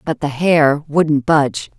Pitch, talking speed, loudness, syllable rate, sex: 150 Hz, 170 wpm, -15 LUFS, 3.8 syllables/s, female